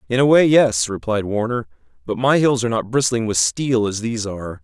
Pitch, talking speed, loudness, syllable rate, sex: 115 Hz, 220 wpm, -18 LUFS, 5.7 syllables/s, male